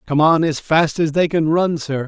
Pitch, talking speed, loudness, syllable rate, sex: 160 Hz, 260 wpm, -17 LUFS, 4.6 syllables/s, male